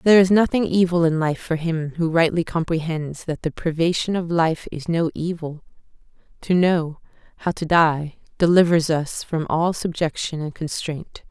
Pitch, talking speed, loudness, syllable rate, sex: 165 Hz, 165 wpm, -21 LUFS, 4.7 syllables/s, female